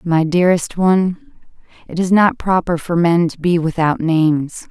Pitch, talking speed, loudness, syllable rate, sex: 170 Hz, 165 wpm, -16 LUFS, 4.7 syllables/s, female